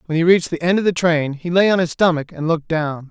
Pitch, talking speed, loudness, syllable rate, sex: 170 Hz, 310 wpm, -18 LUFS, 6.4 syllables/s, male